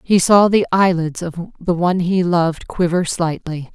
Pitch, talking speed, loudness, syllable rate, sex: 175 Hz, 175 wpm, -17 LUFS, 4.8 syllables/s, female